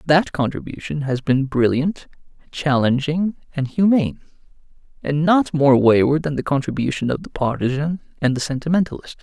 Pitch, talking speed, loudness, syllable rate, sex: 145 Hz, 135 wpm, -19 LUFS, 5.2 syllables/s, male